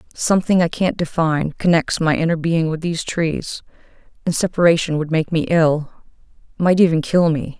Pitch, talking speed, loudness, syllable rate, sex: 165 Hz, 160 wpm, -18 LUFS, 5.3 syllables/s, female